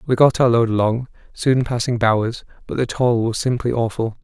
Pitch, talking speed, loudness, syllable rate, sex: 120 Hz, 200 wpm, -19 LUFS, 5.3 syllables/s, male